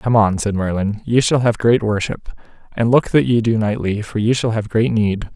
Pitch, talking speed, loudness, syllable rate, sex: 110 Hz, 235 wpm, -17 LUFS, 5.0 syllables/s, male